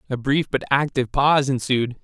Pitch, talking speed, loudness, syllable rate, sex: 135 Hz, 175 wpm, -20 LUFS, 6.0 syllables/s, male